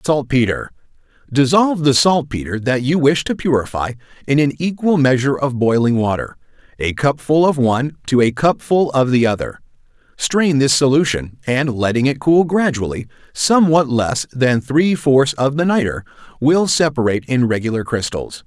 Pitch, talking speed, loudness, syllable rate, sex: 135 Hz, 150 wpm, -16 LUFS, 5.1 syllables/s, male